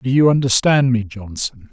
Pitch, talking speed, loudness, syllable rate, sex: 120 Hz, 175 wpm, -16 LUFS, 4.8 syllables/s, male